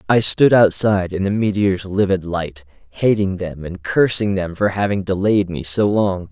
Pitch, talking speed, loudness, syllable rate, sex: 95 Hz, 180 wpm, -18 LUFS, 4.5 syllables/s, male